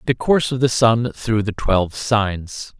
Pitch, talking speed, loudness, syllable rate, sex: 115 Hz, 195 wpm, -19 LUFS, 4.2 syllables/s, male